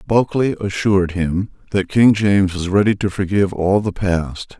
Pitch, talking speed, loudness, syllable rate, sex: 95 Hz, 170 wpm, -17 LUFS, 5.0 syllables/s, male